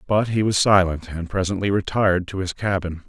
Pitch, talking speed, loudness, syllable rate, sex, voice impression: 95 Hz, 195 wpm, -21 LUFS, 5.5 syllables/s, male, very masculine, very middle-aged, thick, tensed, very powerful, very bright, slightly soft, very clear, very fluent, slightly raspy, very cool, intellectual, refreshing, sincere, slightly calm, mature, very friendly, very reassuring, very unique, slightly elegant, very wild, slightly sweet, very lively, slightly kind, intense